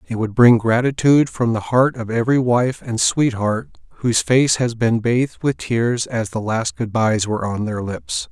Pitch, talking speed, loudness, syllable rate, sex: 115 Hz, 200 wpm, -18 LUFS, 4.7 syllables/s, male